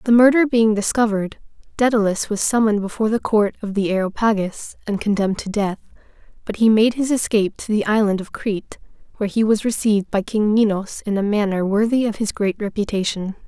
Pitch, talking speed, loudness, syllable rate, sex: 210 Hz, 185 wpm, -19 LUFS, 6.0 syllables/s, female